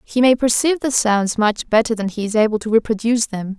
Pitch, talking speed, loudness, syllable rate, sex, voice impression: 225 Hz, 235 wpm, -17 LUFS, 6.0 syllables/s, female, feminine, slightly adult-like, slightly fluent, sincere, slightly friendly